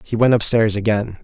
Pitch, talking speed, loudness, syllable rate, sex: 110 Hz, 245 wpm, -16 LUFS, 5.4 syllables/s, male